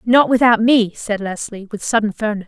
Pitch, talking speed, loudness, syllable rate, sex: 215 Hz, 195 wpm, -17 LUFS, 5.0 syllables/s, female